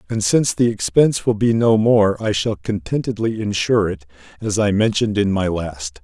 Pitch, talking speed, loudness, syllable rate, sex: 110 Hz, 190 wpm, -18 LUFS, 5.3 syllables/s, male